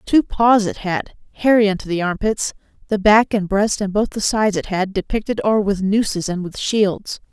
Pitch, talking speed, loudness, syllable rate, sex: 205 Hz, 205 wpm, -18 LUFS, 5.2 syllables/s, female